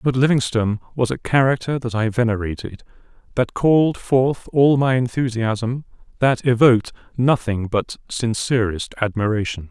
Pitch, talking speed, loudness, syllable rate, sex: 120 Hz, 125 wpm, -19 LUFS, 4.8 syllables/s, male